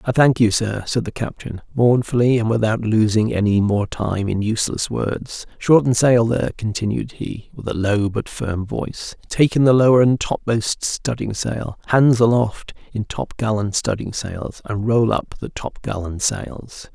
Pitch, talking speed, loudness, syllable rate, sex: 110 Hz, 170 wpm, -19 LUFS, 4.4 syllables/s, male